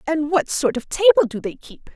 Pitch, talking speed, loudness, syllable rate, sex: 280 Hz, 245 wpm, -19 LUFS, 5.6 syllables/s, female